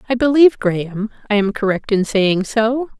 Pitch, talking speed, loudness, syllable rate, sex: 225 Hz, 180 wpm, -16 LUFS, 5.1 syllables/s, female